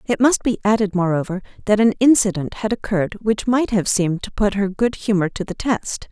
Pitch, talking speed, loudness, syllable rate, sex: 205 Hz, 215 wpm, -19 LUFS, 5.5 syllables/s, female